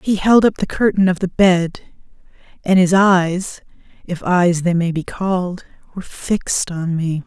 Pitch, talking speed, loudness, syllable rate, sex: 180 Hz, 175 wpm, -16 LUFS, 4.4 syllables/s, female